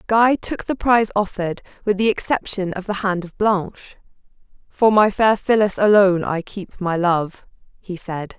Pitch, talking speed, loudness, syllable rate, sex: 200 Hz, 170 wpm, -19 LUFS, 4.9 syllables/s, female